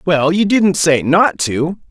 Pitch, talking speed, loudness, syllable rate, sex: 170 Hz, 190 wpm, -14 LUFS, 3.5 syllables/s, male